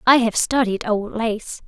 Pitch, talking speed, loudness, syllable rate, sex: 225 Hz, 180 wpm, -20 LUFS, 4.0 syllables/s, female